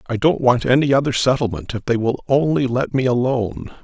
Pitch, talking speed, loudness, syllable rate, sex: 125 Hz, 190 wpm, -18 LUFS, 5.9 syllables/s, male